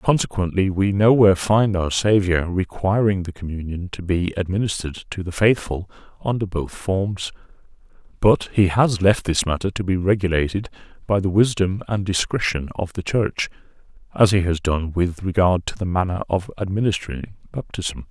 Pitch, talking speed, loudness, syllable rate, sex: 95 Hz, 155 wpm, -21 LUFS, 5.0 syllables/s, male